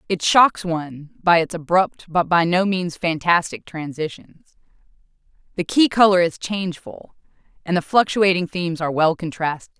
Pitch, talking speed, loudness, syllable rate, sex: 170 Hz, 145 wpm, -19 LUFS, 4.9 syllables/s, female